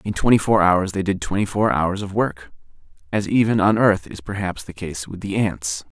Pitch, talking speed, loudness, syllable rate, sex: 95 Hz, 220 wpm, -20 LUFS, 4.9 syllables/s, male